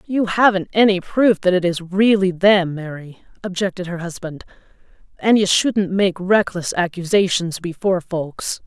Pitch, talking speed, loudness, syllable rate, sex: 185 Hz, 145 wpm, -18 LUFS, 4.5 syllables/s, female